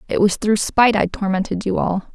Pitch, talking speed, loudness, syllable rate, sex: 200 Hz, 225 wpm, -18 LUFS, 5.8 syllables/s, female